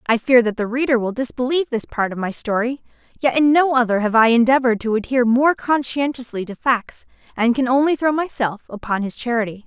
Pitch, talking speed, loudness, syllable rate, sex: 245 Hz, 205 wpm, -18 LUFS, 6.0 syllables/s, female